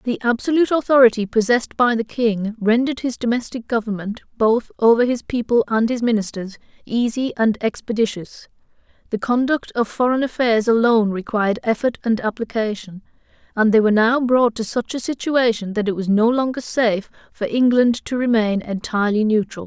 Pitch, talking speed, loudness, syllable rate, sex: 230 Hz, 160 wpm, -19 LUFS, 5.5 syllables/s, female